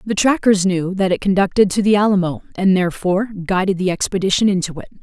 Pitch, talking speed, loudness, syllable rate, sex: 190 Hz, 190 wpm, -17 LUFS, 6.4 syllables/s, female